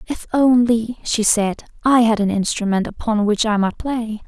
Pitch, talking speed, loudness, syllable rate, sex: 225 Hz, 180 wpm, -18 LUFS, 4.5 syllables/s, female